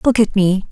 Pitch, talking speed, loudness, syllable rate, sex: 205 Hz, 250 wpm, -15 LUFS, 5.0 syllables/s, female